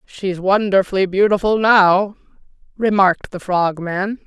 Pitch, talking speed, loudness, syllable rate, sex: 195 Hz, 100 wpm, -16 LUFS, 4.2 syllables/s, female